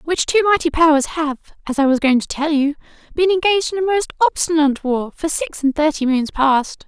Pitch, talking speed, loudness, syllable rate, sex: 305 Hz, 220 wpm, -17 LUFS, 5.5 syllables/s, female